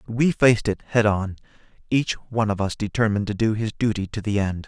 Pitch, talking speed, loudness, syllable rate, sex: 110 Hz, 230 wpm, -22 LUFS, 6.6 syllables/s, male